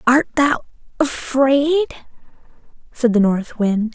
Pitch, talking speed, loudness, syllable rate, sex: 255 Hz, 105 wpm, -18 LUFS, 3.5 syllables/s, female